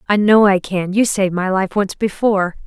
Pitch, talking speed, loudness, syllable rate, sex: 195 Hz, 225 wpm, -16 LUFS, 5.4 syllables/s, female